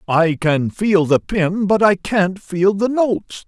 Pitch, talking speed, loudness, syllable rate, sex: 190 Hz, 190 wpm, -17 LUFS, 3.6 syllables/s, male